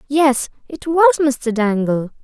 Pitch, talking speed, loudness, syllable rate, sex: 270 Hz, 105 wpm, -16 LUFS, 3.4 syllables/s, female